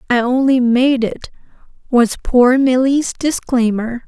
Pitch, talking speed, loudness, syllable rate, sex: 250 Hz, 120 wpm, -15 LUFS, 4.0 syllables/s, female